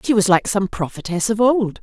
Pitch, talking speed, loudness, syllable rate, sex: 205 Hz, 230 wpm, -18 LUFS, 5.2 syllables/s, female